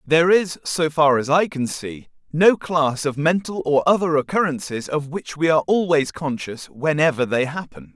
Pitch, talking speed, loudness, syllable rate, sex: 155 Hz, 180 wpm, -20 LUFS, 4.8 syllables/s, male